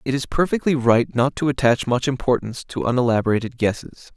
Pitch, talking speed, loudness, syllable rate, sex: 130 Hz, 175 wpm, -20 LUFS, 6.0 syllables/s, male